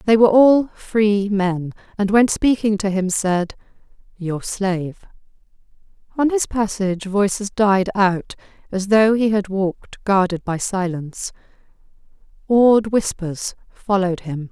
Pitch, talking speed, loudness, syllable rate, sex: 200 Hz, 130 wpm, -19 LUFS, 4.1 syllables/s, female